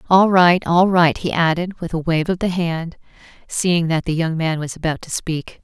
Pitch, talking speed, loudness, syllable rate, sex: 170 Hz, 225 wpm, -18 LUFS, 4.7 syllables/s, female